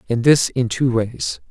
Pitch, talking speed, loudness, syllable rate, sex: 125 Hz, 200 wpm, -18 LUFS, 4.0 syllables/s, male